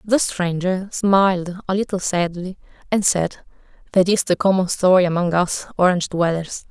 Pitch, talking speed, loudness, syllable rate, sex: 185 Hz, 150 wpm, -19 LUFS, 4.9 syllables/s, female